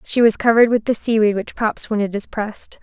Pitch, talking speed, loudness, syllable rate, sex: 220 Hz, 255 wpm, -18 LUFS, 5.9 syllables/s, female